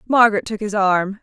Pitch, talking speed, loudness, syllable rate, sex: 210 Hz, 195 wpm, -17 LUFS, 5.7 syllables/s, female